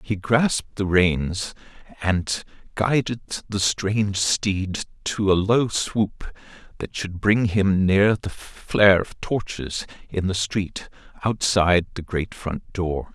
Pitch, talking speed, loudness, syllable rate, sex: 100 Hz, 135 wpm, -22 LUFS, 3.5 syllables/s, male